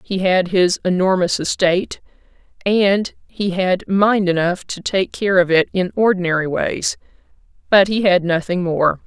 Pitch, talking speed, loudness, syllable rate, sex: 185 Hz, 150 wpm, -17 LUFS, 4.3 syllables/s, female